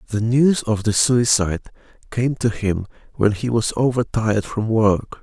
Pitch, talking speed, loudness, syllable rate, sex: 110 Hz, 160 wpm, -19 LUFS, 4.6 syllables/s, male